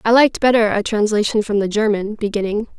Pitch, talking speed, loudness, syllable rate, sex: 215 Hz, 195 wpm, -17 LUFS, 6.1 syllables/s, female